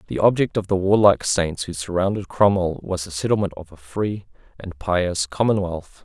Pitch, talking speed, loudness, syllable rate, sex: 95 Hz, 180 wpm, -21 LUFS, 5.1 syllables/s, male